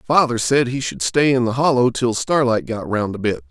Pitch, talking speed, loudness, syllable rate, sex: 120 Hz, 240 wpm, -18 LUFS, 5.1 syllables/s, male